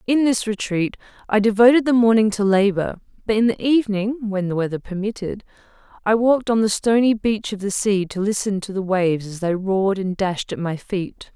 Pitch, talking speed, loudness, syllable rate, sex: 205 Hz, 205 wpm, -20 LUFS, 5.4 syllables/s, female